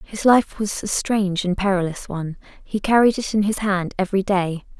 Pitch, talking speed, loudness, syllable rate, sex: 195 Hz, 200 wpm, -20 LUFS, 5.4 syllables/s, female